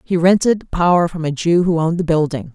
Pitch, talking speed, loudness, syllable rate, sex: 165 Hz, 235 wpm, -16 LUFS, 5.7 syllables/s, female